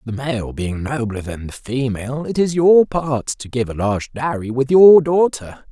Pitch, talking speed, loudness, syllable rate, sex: 130 Hz, 200 wpm, -17 LUFS, 4.5 syllables/s, male